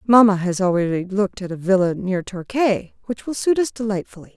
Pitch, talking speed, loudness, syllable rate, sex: 200 Hz, 195 wpm, -20 LUFS, 5.6 syllables/s, female